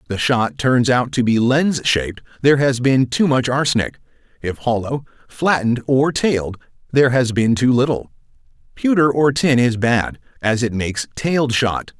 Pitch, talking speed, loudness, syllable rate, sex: 125 Hz, 175 wpm, -17 LUFS, 4.9 syllables/s, male